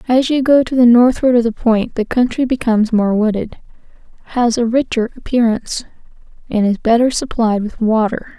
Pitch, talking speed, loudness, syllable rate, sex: 235 Hz, 170 wpm, -15 LUFS, 5.3 syllables/s, female